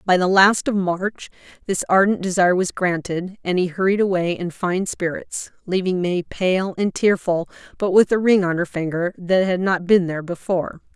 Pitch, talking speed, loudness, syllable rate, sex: 185 Hz, 190 wpm, -20 LUFS, 4.9 syllables/s, female